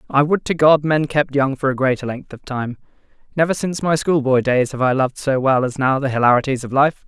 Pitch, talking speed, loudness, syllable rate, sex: 135 Hz, 255 wpm, -18 LUFS, 5.9 syllables/s, male